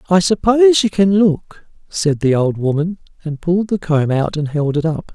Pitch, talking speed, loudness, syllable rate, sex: 170 Hz, 210 wpm, -16 LUFS, 4.9 syllables/s, male